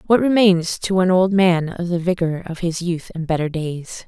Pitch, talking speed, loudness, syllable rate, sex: 175 Hz, 220 wpm, -19 LUFS, 4.7 syllables/s, female